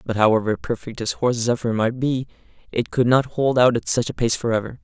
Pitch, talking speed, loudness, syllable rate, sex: 120 Hz, 225 wpm, -21 LUFS, 5.9 syllables/s, male